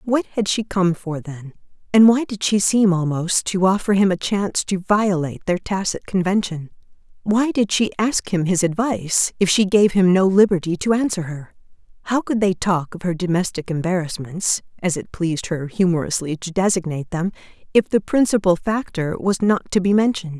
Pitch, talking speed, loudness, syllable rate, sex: 190 Hz, 185 wpm, -19 LUFS, 5.2 syllables/s, female